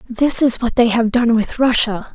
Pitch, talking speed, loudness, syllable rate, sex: 235 Hz, 225 wpm, -15 LUFS, 4.5 syllables/s, female